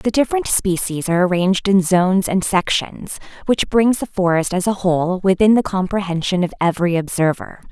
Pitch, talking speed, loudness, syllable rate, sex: 185 Hz, 170 wpm, -17 LUFS, 5.5 syllables/s, female